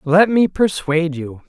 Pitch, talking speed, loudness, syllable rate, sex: 170 Hz, 160 wpm, -16 LUFS, 4.4 syllables/s, male